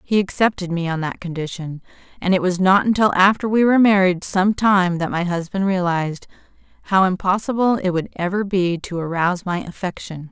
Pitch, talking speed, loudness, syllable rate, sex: 185 Hz, 180 wpm, -19 LUFS, 5.5 syllables/s, female